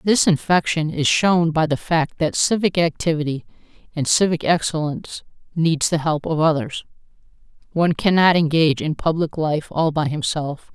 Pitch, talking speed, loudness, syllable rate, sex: 160 Hz, 150 wpm, -19 LUFS, 4.9 syllables/s, female